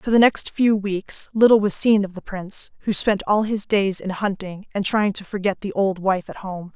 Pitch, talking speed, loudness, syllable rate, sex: 200 Hz, 240 wpm, -21 LUFS, 4.8 syllables/s, female